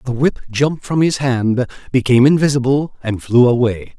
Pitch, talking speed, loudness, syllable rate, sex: 130 Hz, 165 wpm, -15 LUFS, 5.3 syllables/s, male